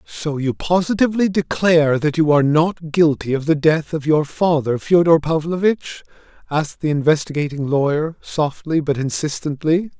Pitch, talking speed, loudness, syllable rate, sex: 155 Hz, 145 wpm, -18 LUFS, 5.0 syllables/s, male